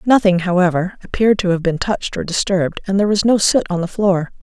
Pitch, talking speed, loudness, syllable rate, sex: 190 Hz, 225 wpm, -17 LUFS, 6.4 syllables/s, female